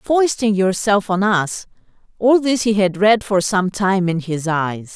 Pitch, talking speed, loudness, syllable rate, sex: 200 Hz, 180 wpm, -17 LUFS, 3.9 syllables/s, female